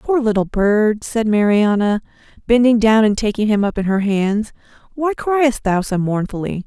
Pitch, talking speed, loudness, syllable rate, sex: 220 Hz, 170 wpm, -17 LUFS, 4.6 syllables/s, female